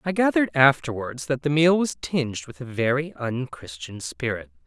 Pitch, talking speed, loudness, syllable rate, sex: 135 Hz, 165 wpm, -23 LUFS, 5.1 syllables/s, male